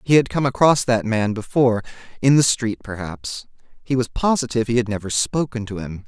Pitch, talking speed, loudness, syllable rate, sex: 120 Hz, 190 wpm, -20 LUFS, 5.6 syllables/s, male